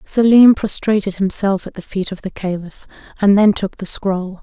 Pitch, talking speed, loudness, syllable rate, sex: 195 Hz, 190 wpm, -16 LUFS, 4.8 syllables/s, female